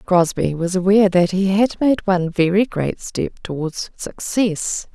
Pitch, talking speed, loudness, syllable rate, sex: 185 Hz, 160 wpm, -19 LUFS, 4.2 syllables/s, female